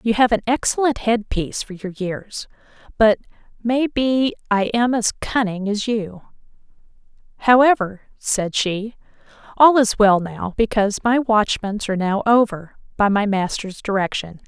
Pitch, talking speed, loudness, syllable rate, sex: 215 Hz, 140 wpm, -19 LUFS, 4.5 syllables/s, female